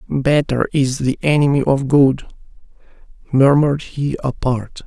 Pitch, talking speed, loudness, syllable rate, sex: 135 Hz, 110 wpm, -16 LUFS, 4.4 syllables/s, male